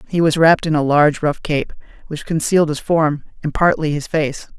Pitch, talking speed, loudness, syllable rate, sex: 155 Hz, 210 wpm, -17 LUFS, 5.5 syllables/s, male